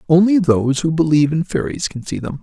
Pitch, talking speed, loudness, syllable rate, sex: 155 Hz, 225 wpm, -17 LUFS, 6.2 syllables/s, male